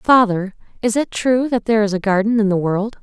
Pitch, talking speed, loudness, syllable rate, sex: 215 Hz, 240 wpm, -17 LUFS, 5.5 syllables/s, female